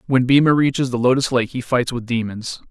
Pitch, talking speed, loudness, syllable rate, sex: 125 Hz, 220 wpm, -18 LUFS, 5.7 syllables/s, male